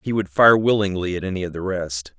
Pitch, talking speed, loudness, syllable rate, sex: 95 Hz, 245 wpm, -20 LUFS, 5.8 syllables/s, male